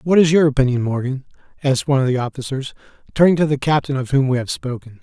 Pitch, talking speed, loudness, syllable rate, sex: 135 Hz, 225 wpm, -18 LUFS, 7.0 syllables/s, male